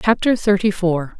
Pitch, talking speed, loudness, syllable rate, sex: 195 Hz, 150 wpm, -18 LUFS, 4.6 syllables/s, female